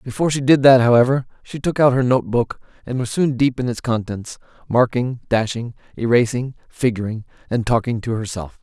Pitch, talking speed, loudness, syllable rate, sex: 125 Hz, 180 wpm, -19 LUFS, 5.5 syllables/s, male